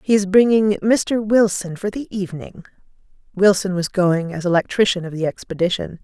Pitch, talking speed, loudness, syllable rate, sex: 190 Hz, 160 wpm, -18 LUFS, 2.9 syllables/s, female